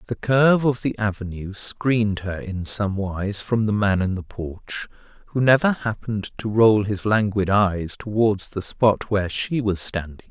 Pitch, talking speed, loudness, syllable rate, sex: 105 Hz, 180 wpm, -22 LUFS, 4.4 syllables/s, male